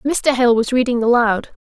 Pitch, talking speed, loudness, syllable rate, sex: 240 Hz, 185 wpm, -16 LUFS, 4.6 syllables/s, female